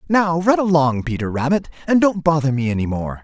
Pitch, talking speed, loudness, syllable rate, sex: 155 Hz, 205 wpm, -18 LUFS, 5.5 syllables/s, male